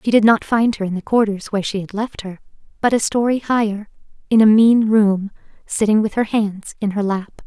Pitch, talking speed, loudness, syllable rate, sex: 215 Hz, 225 wpm, -17 LUFS, 5.3 syllables/s, female